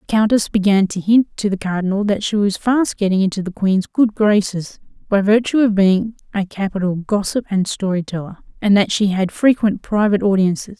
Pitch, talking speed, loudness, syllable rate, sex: 200 Hz, 195 wpm, -17 LUFS, 5.3 syllables/s, female